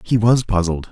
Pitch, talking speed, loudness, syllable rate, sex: 105 Hz, 195 wpm, -17 LUFS, 4.9 syllables/s, male